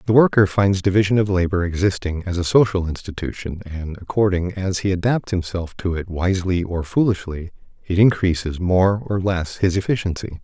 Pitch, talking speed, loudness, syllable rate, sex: 95 Hz, 165 wpm, -20 LUFS, 5.4 syllables/s, male